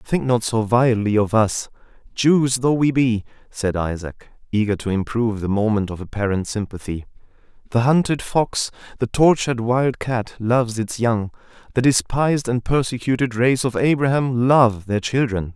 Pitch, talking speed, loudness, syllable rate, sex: 120 Hz, 145 wpm, -20 LUFS, 4.8 syllables/s, male